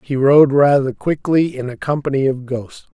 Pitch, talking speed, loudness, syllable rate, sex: 135 Hz, 185 wpm, -16 LUFS, 4.7 syllables/s, male